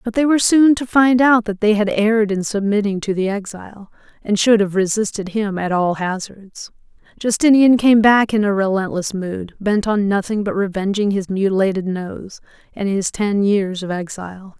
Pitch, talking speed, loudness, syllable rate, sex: 205 Hz, 185 wpm, -17 LUFS, 5.0 syllables/s, female